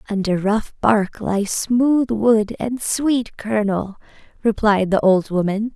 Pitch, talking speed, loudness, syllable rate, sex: 215 Hz, 135 wpm, -19 LUFS, 3.4 syllables/s, female